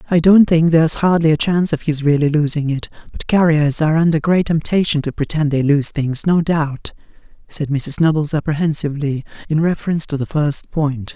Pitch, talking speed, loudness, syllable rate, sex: 155 Hz, 190 wpm, -16 LUFS, 5.5 syllables/s, male